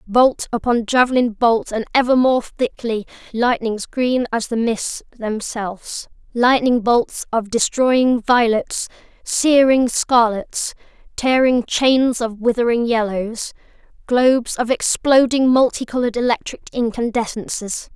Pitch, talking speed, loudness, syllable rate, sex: 240 Hz, 105 wpm, -18 LUFS, 4.0 syllables/s, female